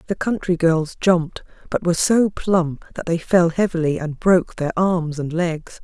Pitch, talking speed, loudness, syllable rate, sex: 170 Hz, 185 wpm, -20 LUFS, 4.5 syllables/s, female